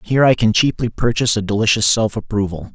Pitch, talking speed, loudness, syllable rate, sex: 110 Hz, 195 wpm, -16 LUFS, 6.4 syllables/s, male